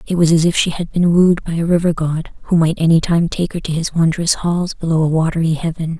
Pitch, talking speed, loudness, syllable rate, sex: 165 Hz, 260 wpm, -16 LUFS, 5.8 syllables/s, female